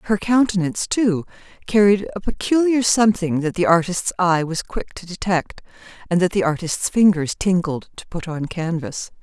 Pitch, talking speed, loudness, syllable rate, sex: 185 Hz, 165 wpm, -20 LUFS, 4.9 syllables/s, female